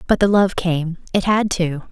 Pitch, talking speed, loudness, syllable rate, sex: 180 Hz, 220 wpm, -18 LUFS, 4.5 syllables/s, female